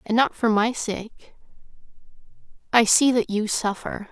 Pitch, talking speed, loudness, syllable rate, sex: 225 Hz, 130 wpm, -21 LUFS, 4.2 syllables/s, female